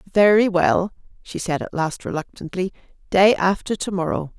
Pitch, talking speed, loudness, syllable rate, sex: 185 Hz, 150 wpm, -20 LUFS, 4.7 syllables/s, female